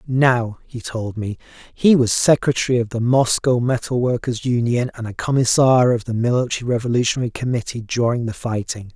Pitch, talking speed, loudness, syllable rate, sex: 120 Hz, 160 wpm, -19 LUFS, 5.4 syllables/s, male